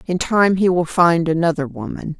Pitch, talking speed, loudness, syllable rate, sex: 165 Hz, 190 wpm, -17 LUFS, 4.9 syllables/s, female